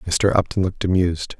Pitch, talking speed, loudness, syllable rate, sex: 90 Hz, 170 wpm, -20 LUFS, 6.6 syllables/s, male